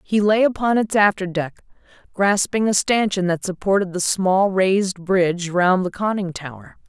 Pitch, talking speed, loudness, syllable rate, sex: 190 Hz, 165 wpm, -19 LUFS, 4.7 syllables/s, female